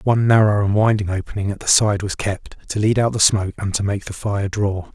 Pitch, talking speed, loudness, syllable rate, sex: 100 Hz, 255 wpm, -19 LUFS, 5.7 syllables/s, male